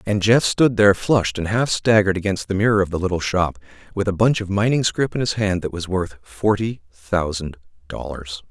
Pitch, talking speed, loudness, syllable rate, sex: 100 Hz, 210 wpm, -20 LUFS, 5.4 syllables/s, male